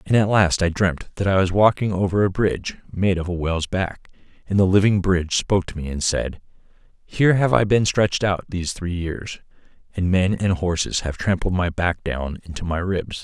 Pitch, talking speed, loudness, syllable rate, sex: 90 Hz, 215 wpm, -21 LUFS, 5.3 syllables/s, male